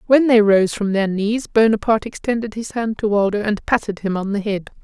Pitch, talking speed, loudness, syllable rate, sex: 210 Hz, 225 wpm, -18 LUFS, 5.5 syllables/s, female